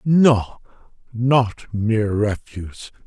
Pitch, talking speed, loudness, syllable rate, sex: 115 Hz, 80 wpm, -19 LUFS, 3.1 syllables/s, male